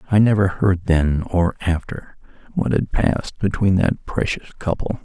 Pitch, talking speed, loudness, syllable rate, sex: 95 Hz, 155 wpm, -20 LUFS, 4.4 syllables/s, male